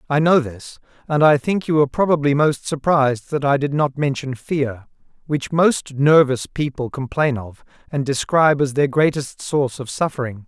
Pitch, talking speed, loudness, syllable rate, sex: 140 Hz, 180 wpm, -19 LUFS, 4.9 syllables/s, male